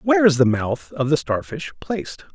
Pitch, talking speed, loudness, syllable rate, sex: 155 Hz, 205 wpm, -21 LUFS, 5.2 syllables/s, male